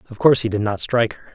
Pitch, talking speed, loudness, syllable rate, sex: 110 Hz, 265 wpm, -19 LUFS, 8.1 syllables/s, male